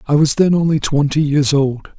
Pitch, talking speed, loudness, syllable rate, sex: 145 Hz, 210 wpm, -15 LUFS, 5.0 syllables/s, male